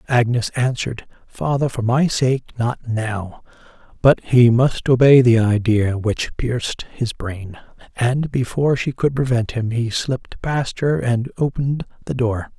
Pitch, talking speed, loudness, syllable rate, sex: 125 Hz, 155 wpm, -19 LUFS, 4.3 syllables/s, male